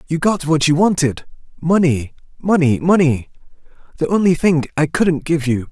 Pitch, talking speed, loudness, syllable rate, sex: 155 Hz, 135 wpm, -16 LUFS, 4.7 syllables/s, male